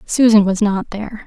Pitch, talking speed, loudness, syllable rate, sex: 210 Hz, 190 wpm, -14 LUFS, 5.1 syllables/s, female